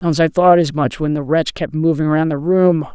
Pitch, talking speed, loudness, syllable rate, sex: 155 Hz, 265 wpm, -16 LUFS, 5.2 syllables/s, male